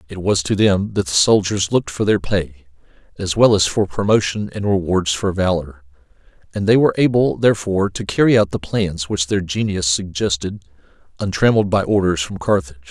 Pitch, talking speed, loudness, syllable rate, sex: 95 Hz, 180 wpm, -18 LUFS, 5.6 syllables/s, male